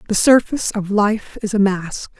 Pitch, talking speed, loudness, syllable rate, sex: 205 Hz, 190 wpm, -17 LUFS, 4.7 syllables/s, female